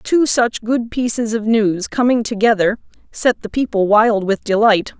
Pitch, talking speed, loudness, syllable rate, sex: 220 Hz, 170 wpm, -16 LUFS, 4.4 syllables/s, female